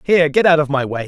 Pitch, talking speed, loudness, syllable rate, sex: 155 Hz, 335 wpm, -15 LUFS, 7.2 syllables/s, male